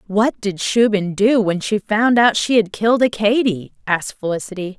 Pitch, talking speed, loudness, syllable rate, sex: 210 Hz, 175 wpm, -17 LUFS, 4.9 syllables/s, female